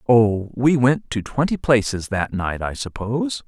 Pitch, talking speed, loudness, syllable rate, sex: 120 Hz, 175 wpm, -20 LUFS, 4.3 syllables/s, male